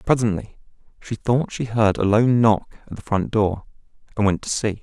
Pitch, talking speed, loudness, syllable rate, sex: 110 Hz, 200 wpm, -20 LUFS, 4.8 syllables/s, male